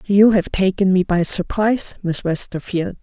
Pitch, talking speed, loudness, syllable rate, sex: 190 Hz, 160 wpm, -18 LUFS, 4.6 syllables/s, female